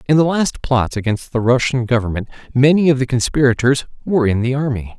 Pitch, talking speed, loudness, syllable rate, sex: 130 Hz, 195 wpm, -17 LUFS, 5.8 syllables/s, male